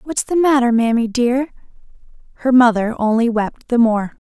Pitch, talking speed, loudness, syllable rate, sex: 240 Hz, 155 wpm, -16 LUFS, 4.9 syllables/s, female